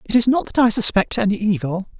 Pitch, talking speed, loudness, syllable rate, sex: 220 Hz, 240 wpm, -18 LUFS, 6.0 syllables/s, female